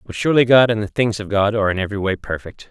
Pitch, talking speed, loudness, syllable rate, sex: 105 Hz, 290 wpm, -18 LUFS, 7.3 syllables/s, male